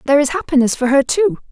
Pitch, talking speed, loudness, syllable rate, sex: 280 Hz, 235 wpm, -15 LUFS, 7.3 syllables/s, female